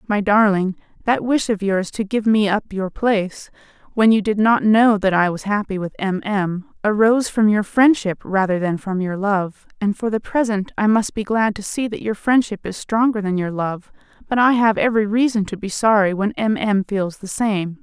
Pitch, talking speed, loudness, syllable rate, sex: 205 Hz, 220 wpm, -19 LUFS, 4.9 syllables/s, female